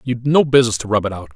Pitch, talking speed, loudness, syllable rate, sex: 120 Hz, 310 wpm, -16 LUFS, 7.4 syllables/s, male